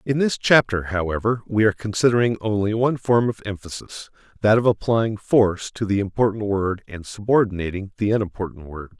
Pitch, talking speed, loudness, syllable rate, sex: 105 Hz, 165 wpm, -21 LUFS, 5.7 syllables/s, male